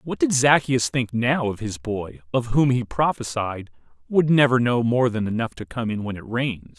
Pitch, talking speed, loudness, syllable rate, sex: 120 Hz, 210 wpm, -22 LUFS, 4.7 syllables/s, male